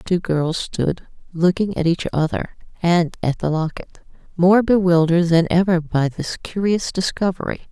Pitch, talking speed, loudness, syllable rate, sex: 175 Hz, 155 wpm, -19 LUFS, 4.8 syllables/s, female